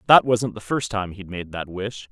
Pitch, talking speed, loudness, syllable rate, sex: 105 Hz, 255 wpm, -23 LUFS, 4.7 syllables/s, male